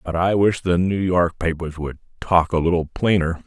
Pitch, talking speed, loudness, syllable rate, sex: 85 Hz, 210 wpm, -20 LUFS, 4.8 syllables/s, male